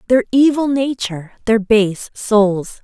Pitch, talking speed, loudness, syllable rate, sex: 225 Hz, 105 wpm, -16 LUFS, 3.8 syllables/s, female